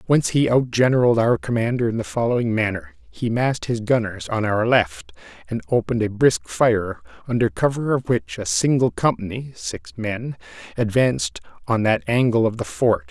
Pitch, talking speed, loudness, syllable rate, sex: 120 Hz, 170 wpm, -21 LUFS, 5.2 syllables/s, male